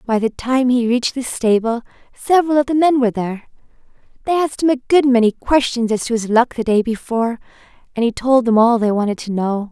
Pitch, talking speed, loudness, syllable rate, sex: 240 Hz, 220 wpm, -17 LUFS, 6.1 syllables/s, female